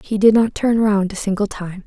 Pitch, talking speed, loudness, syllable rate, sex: 205 Hz, 255 wpm, -17 LUFS, 5.1 syllables/s, female